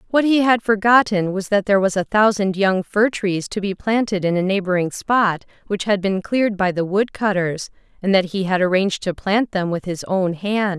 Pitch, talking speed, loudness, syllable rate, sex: 195 Hz, 220 wpm, -19 LUFS, 5.1 syllables/s, female